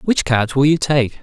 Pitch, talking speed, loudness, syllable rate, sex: 140 Hz, 245 wpm, -16 LUFS, 4.4 syllables/s, male